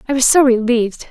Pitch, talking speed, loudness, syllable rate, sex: 250 Hz, 215 wpm, -13 LUFS, 6.5 syllables/s, female